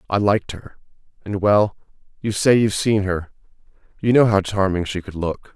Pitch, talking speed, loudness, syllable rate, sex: 100 Hz, 160 wpm, -19 LUFS, 5.3 syllables/s, male